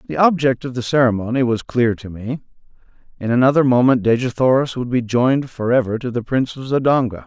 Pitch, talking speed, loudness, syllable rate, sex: 125 Hz, 190 wpm, -18 LUFS, 6.0 syllables/s, male